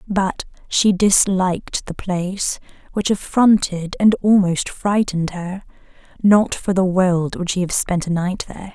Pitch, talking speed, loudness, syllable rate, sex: 185 Hz, 150 wpm, -18 LUFS, 4.2 syllables/s, female